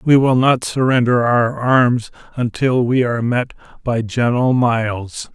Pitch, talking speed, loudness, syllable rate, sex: 120 Hz, 145 wpm, -16 LUFS, 4.2 syllables/s, male